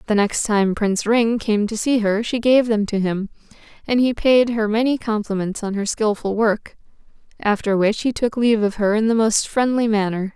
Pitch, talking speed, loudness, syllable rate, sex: 215 Hz, 210 wpm, -19 LUFS, 5.0 syllables/s, female